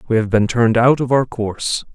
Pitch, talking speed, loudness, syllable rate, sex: 120 Hz, 245 wpm, -16 LUFS, 5.9 syllables/s, male